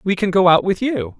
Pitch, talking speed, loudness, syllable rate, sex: 185 Hz, 300 wpm, -16 LUFS, 5.2 syllables/s, male